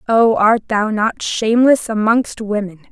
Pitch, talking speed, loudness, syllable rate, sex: 220 Hz, 145 wpm, -15 LUFS, 4.2 syllables/s, female